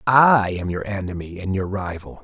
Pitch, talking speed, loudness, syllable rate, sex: 100 Hz, 190 wpm, -21 LUFS, 4.8 syllables/s, male